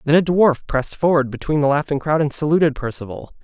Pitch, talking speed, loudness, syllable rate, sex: 150 Hz, 210 wpm, -18 LUFS, 6.3 syllables/s, male